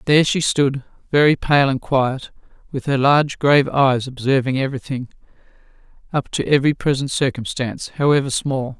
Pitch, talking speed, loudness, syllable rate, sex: 135 Hz, 135 wpm, -18 LUFS, 5.5 syllables/s, female